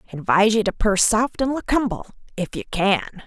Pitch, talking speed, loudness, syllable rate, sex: 215 Hz, 185 wpm, -20 LUFS, 5.3 syllables/s, female